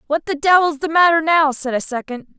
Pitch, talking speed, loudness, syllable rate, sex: 300 Hz, 225 wpm, -16 LUFS, 5.6 syllables/s, female